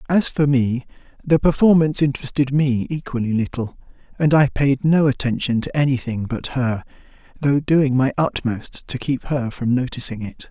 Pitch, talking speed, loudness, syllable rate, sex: 135 Hz, 160 wpm, -20 LUFS, 5.0 syllables/s, male